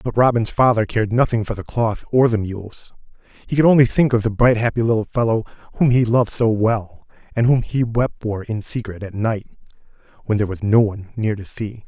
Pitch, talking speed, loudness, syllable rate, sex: 110 Hz, 215 wpm, -19 LUFS, 5.7 syllables/s, male